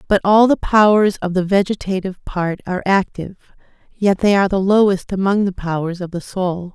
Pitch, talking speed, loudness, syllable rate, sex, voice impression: 190 Hz, 185 wpm, -17 LUFS, 5.6 syllables/s, female, feminine, middle-aged, tensed, slightly soft, clear, intellectual, calm, friendly, reassuring, elegant, lively, kind